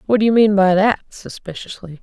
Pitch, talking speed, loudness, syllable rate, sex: 200 Hz, 205 wpm, -15 LUFS, 5.6 syllables/s, female